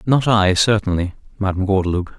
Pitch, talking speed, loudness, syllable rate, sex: 100 Hz, 140 wpm, -18 LUFS, 5.5 syllables/s, male